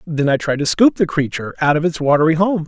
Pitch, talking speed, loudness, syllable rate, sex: 160 Hz, 270 wpm, -16 LUFS, 6.5 syllables/s, male